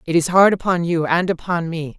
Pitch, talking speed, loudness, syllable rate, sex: 170 Hz, 210 wpm, -18 LUFS, 5.4 syllables/s, female